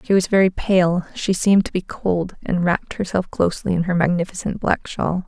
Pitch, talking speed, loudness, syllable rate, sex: 180 Hz, 205 wpm, -20 LUFS, 5.4 syllables/s, female